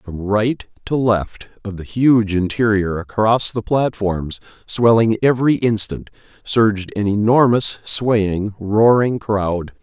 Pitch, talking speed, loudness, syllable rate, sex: 110 Hz, 120 wpm, -17 LUFS, 3.7 syllables/s, male